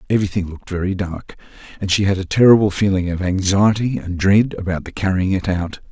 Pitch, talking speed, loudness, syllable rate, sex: 95 Hz, 195 wpm, -18 LUFS, 6.0 syllables/s, male